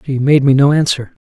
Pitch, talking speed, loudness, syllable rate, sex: 135 Hz, 235 wpm, -13 LUFS, 5.7 syllables/s, male